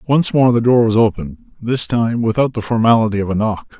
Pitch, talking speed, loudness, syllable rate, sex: 115 Hz, 205 wpm, -15 LUFS, 5.7 syllables/s, male